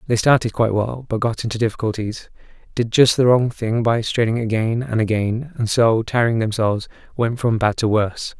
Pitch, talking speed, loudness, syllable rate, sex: 115 Hz, 195 wpm, -19 LUFS, 5.4 syllables/s, male